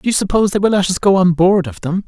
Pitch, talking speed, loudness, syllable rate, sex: 190 Hz, 350 wpm, -14 LUFS, 6.9 syllables/s, male